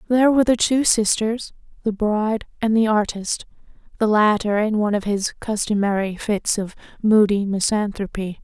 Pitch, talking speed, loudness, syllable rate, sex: 215 Hz, 140 wpm, -20 LUFS, 5.0 syllables/s, female